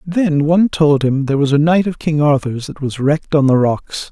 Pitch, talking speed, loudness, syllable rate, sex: 150 Hz, 250 wpm, -15 LUFS, 5.2 syllables/s, male